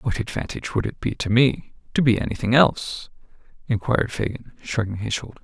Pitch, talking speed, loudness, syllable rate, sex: 115 Hz, 175 wpm, -23 LUFS, 6.0 syllables/s, male